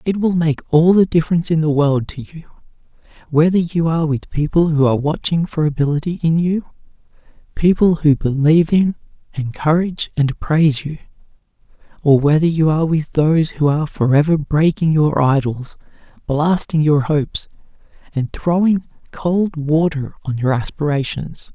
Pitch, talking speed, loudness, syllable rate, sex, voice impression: 155 Hz, 150 wpm, -17 LUFS, 5.1 syllables/s, male, masculine, adult-like, slightly thick, slightly tensed, weak, slightly dark, soft, muffled, fluent, slightly raspy, slightly cool, intellectual, slightly refreshing, sincere, calm, friendly, reassuring, very unique, very elegant, very sweet, lively, very kind, modest